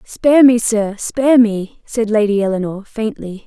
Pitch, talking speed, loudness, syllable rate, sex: 220 Hz, 155 wpm, -15 LUFS, 4.6 syllables/s, female